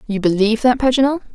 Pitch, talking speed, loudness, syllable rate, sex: 235 Hz, 180 wpm, -16 LUFS, 7.3 syllables/s, female